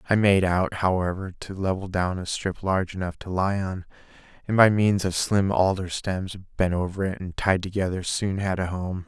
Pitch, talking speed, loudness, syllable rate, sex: 95 Hz, 205 wpm, -24 LUFS, 4.9 syllables/s, male